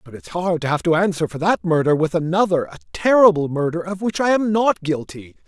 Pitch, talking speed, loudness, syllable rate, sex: 175 Hz, 230 wpm, -19 LUFS, 5.7 syllables/s, male